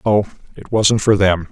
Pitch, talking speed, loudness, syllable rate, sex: 100 Hz, 200 wpm, -16 LUFS, 4.7 syllables/s, male